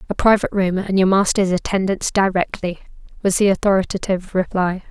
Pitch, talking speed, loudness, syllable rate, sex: 190 Hz, 145 wpm, -18 LUFS, 6.1 syllables/s, female